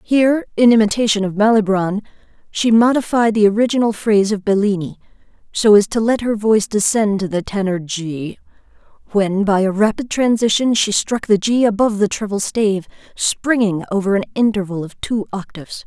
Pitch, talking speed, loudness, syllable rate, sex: 210 Hz, 165 wpm, -16 LUFS, 5.5 syllables/s, female